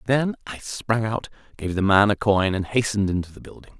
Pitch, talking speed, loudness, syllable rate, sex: 105 Hz, 220 wpm, -22 LUFS, 5.5 syllables/s, male